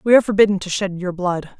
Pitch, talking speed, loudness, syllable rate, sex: 190 Hz, 265 wpm, -18 LUFS, 6.7 syllables/s, female